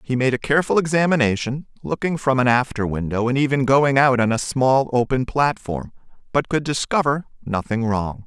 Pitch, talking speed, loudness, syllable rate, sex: 130 Hz, 175 wpm, -20 LUFS, 5.3 syllables/s, male